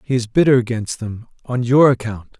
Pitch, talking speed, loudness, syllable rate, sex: 120 Hz, 200 wpm, -17 LUFS, 5.2 syllables/s, male